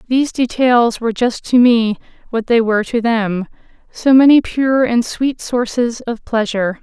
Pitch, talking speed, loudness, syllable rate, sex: 240 Hz, 160 wpm, -15 LUFS, 4.6 syllables/s, female